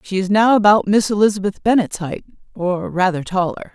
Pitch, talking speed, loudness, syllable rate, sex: 195 Hz, 175 wpm, -17 LUFS, 5.4 syllables/s, female